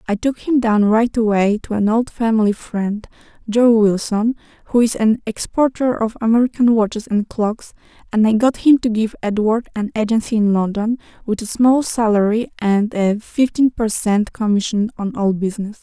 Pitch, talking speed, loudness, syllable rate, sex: 220 Hz, 175 wpm, -17 LUFS, 4.8 syllables/s, female